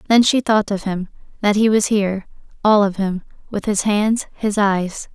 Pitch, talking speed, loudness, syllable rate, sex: 205 Hz, 200 wpm, -18 LUFS, 4.6 syllables/s, female